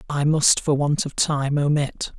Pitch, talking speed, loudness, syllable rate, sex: 145 Hz, 190 wpm, -21 LUFS, 4.0 syllables/s, male